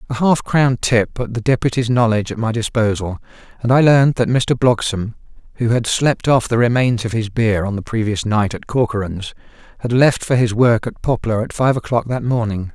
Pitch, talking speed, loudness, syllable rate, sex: 115 Hz, 205 wpm, -17 LUFS, 5.3 syllables/s, male